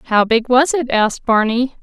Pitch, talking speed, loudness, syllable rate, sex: 240 Hz, 195 wpm, -15 LUFS, 4.6 syllables/s, female